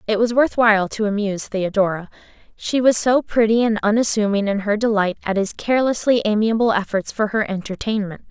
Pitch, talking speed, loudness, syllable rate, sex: 215 Hz, 175 wpm, -19 LUFS, 5.7 syllables/s, female